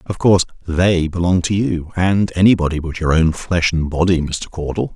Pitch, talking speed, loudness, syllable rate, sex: 85 Hz, 195 wpm, -17 LUFS, 5.0 syllables/s, male